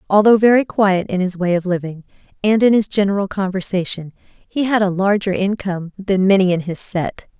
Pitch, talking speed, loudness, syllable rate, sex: 195 Hz, 185 wpm, -17 LUFS, 5.3 syllables/s, female